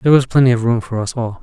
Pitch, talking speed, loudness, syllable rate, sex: 120 Hz, 340 wpm, -15 LUFS, 7.3 syllables/s, male